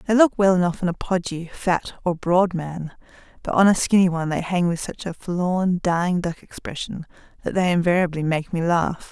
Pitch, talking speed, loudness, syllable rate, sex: 175 Hz, 205 wpm, -21 LUFS, 5.3 syllables/s, female